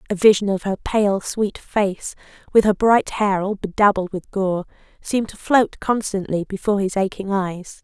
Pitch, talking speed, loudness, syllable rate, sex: 200 Hz, 175 wpm, -20 LUFS, 4.6 syllables/s, female